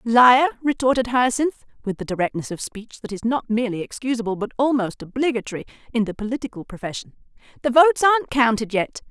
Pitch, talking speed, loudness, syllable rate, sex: 240 Hz, 165 wpm, -21 LUFS, 6.2 syllables/s, female